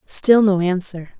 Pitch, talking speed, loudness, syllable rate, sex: 190 Hz, 150 wpm, -16 LUFS, 3.9 syllables/s, female